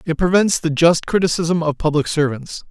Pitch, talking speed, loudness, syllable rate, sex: 160 Hz, 175 wpm, -17 LUFS, 5.1 syllables/s, male